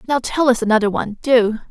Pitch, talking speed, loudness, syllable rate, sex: 235 Hz, 210 wpm, -17 LUFS, 6.5 syllables/s, female